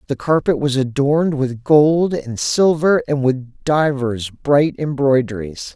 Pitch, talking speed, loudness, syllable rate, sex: 140 Hz, 135 wpm, -17 LUFS, 3.8 syllables/s, male